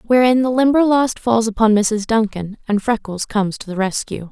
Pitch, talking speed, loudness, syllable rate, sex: 225 Hz, 180 wpm, -17 LUFS, 5.2 syllables/s, female